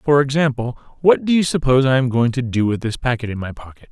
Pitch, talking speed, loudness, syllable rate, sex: 130 Hz, 260 wpm, -18 LUFS, 6.4 syllables/s, male